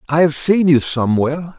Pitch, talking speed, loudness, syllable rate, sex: 150 Hz, 190 wpm, -15 LUFS, 5.7 syllables/s, male